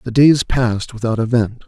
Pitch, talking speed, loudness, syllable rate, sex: 120 Hz, 180 wpm, -16 LUFS, 5.2 syllables/s, male